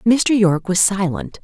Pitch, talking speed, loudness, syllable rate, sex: 200 Hz, 165 wpm, -16 LUFS, 4.3 syllables/s, female